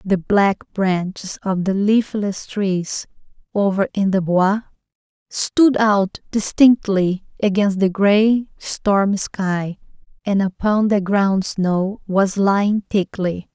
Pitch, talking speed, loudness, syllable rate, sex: 200 Hz, 120 wpm, -18 LUFS, 3.3 syllables/s, female